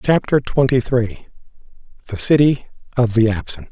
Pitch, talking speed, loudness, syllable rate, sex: 130 Hz, 115 wpm, -17 LUFS, 4.8 syllables/s, male